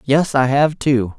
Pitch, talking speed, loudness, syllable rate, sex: 135 Hz, 200 wpm, -16 LUFS, 3.7 syllables/s, male